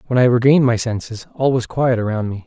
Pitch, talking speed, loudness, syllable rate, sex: 120 Hz, 245 wpm, -17 LUFS, 6.3 syllables/s, male